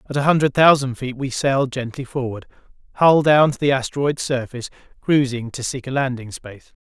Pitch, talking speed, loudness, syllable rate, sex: 130 Hz, 185 wpm, -19 LUFS, 5.8 syllables/s, male